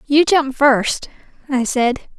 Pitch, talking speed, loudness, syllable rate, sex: 270 Hz, 135 wpm, -17 LUFS, 3.2 syllables/s, female